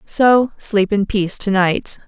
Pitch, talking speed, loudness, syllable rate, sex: 205 Hz, 175 wpm, -16 LUFS, 3.7 syllables/s, female